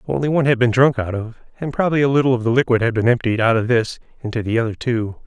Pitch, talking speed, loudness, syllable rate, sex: 120 Hz, 275 wpm, -18 LUFS, 7.1 syllables/s, male